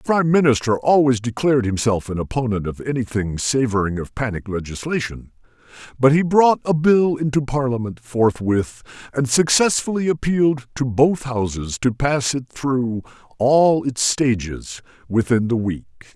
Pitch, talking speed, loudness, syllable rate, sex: 125 Hz, 140 wpm, -19 LUFS, 4.8 syllables/s, male